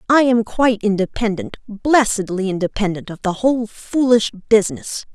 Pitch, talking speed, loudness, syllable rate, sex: 220 Hz, 130 wpm, -18 LUFS, 5.2 syllables/s, female